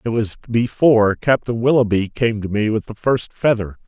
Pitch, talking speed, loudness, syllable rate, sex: 115 Hz, 185 wpm, -18 LUFS, 5.0 syllables/s, male